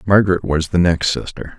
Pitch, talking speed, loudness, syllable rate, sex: 85 Hz, 190 wpm, -17 LUFS, 5.5 syllables/s, male